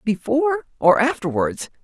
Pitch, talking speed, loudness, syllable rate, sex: 265 Hz, 100 wpm, -20 LUFS, 4.6 syllables/s, female